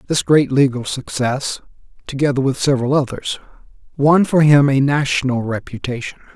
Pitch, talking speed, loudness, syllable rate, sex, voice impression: 135 Hz, 130 wpm, -17 LUFS, 5.2 syllables/s, male, masculine, middle-aged, slightly muffled, sincere, slightly calm, slightly elegant, kind